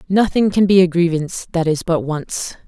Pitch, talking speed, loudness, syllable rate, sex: 175 Hz, 200 wpm, -17 LUFS, 5.1 syllables/s, female